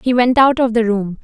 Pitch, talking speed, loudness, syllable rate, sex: 235 Hz, 290 wpm, -14 LUFS, 5.1 syllables/s, female